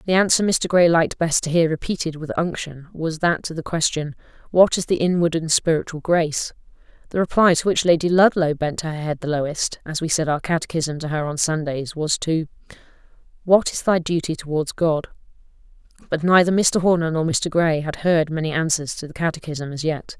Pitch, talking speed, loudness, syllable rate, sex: 160 Hz, 200 wpm, -20 LUFS, 5.4 syllables/s, female